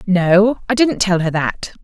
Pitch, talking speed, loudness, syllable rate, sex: 195 Hz, 195 wpm, -15 LUFS, 3.8 syllables/s, female